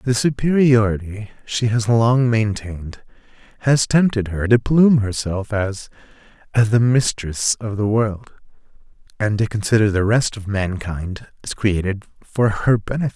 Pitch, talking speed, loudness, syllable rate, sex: 110 Hz, 135 wpm, -18 LUFS, 4.3 syllables/s, male